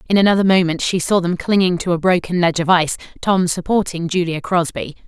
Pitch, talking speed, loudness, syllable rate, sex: 175 Hz, 200 wpm, -17 LUFS, 6.2 syllables/s, female